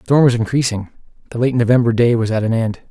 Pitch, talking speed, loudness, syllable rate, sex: 115 Hz, 250 wpm, -16 LUFS, 6.5 syllables/s, male